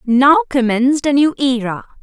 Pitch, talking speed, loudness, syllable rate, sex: 265 Hz, 150 wpm, -14 LUFS, 4.7 syllables/s, female